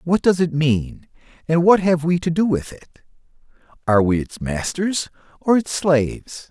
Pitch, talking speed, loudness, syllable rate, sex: 160 Hz, 175 wpm, -19 LUFS, 4.5 syllables/s, male